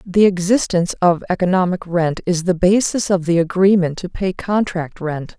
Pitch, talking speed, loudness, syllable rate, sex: 180 Hz, 165 wpm, -17 LUFS, 4.9 syllables/s, female